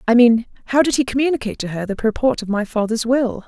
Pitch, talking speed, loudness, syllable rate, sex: 235 Hz, 240 wpm, -18 LUFS, 6.5 syllables/s, female